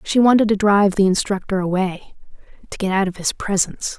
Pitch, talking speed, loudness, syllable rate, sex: 195 Hz, 195 wpm, -18 LUFS, 6.0 syllables/s, female